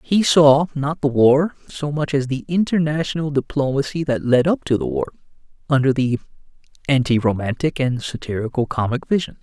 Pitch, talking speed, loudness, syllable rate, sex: 140 Hz, 160 wpm, -19 LUFS, 5.3 syllables/s, male